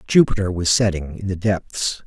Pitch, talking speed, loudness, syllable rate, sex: 95 Hz, 175 wpm, -20 LUFS, 4.7 syllables/s, male